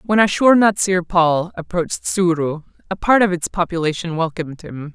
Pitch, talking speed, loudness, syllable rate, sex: 180 Hz, 160 wpm, -18 LUFS, 5.0 syllables/s, female